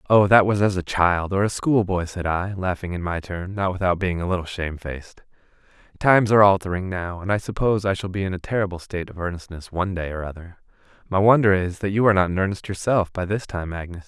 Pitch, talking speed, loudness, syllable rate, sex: 95 Hz, 240 wpm, -22 LUFS, 6.4 syllables/s, male